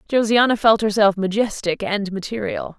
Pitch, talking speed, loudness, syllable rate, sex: 210 Hz, 130 wpm, -19 LUFS, 5.0 syllables/s, female